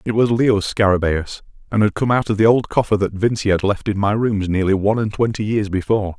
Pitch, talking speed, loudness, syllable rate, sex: 105 Hz, 245 wpm, -18 LUFS, 5.9 syllables/s, male